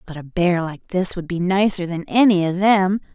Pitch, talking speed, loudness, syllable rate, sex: 180 Hz, 230 wpm, -19 LUFS, 4.9 syllables/s, female